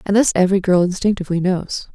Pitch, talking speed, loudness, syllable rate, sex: 185 Hz, 185 wpm, -17 LUFS, 6.7 syllables/s, female